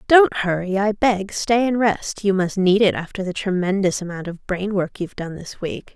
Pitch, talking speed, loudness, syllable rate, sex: 195 Hz, 220 wpm, -20 LUFS, 4.8 syllables/s, female